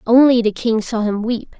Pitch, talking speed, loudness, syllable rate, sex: 230 Hz, 225 wpm, -16 LUFS, 5.1 syllables/s, female